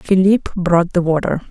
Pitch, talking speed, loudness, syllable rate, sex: 180 Hz, 160 wpm, -16 LUFS, 4.3 syllables/s, female